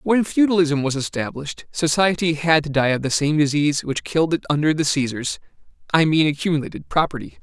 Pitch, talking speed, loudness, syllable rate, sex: 150 Hz, 170 wpm, -20 LUFS, 5.8 syllables/s, male